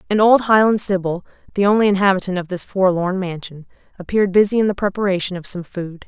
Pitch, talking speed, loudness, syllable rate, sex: 190 Hz, 190 wpm, -17 LUFS, 6.3 syllables/s, female